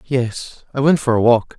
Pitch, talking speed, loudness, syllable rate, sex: 125 Hz, 230 wpm, -17 LUFS, 4.3 syllables/s, male